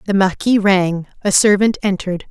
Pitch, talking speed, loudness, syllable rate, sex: 195 Hz, 155 wpm, -15 LUFS, 5.1 syllables/s, female